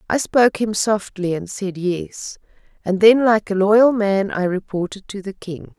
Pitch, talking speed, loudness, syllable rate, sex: 200 Hz, 185 wpm, -18 LUFS, 4.3 syllables/s, female